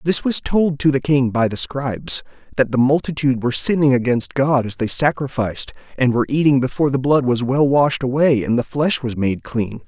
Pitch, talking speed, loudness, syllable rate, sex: 130 Hz, 215 wpm, -18 LUFS, 5.5 syllables/s, male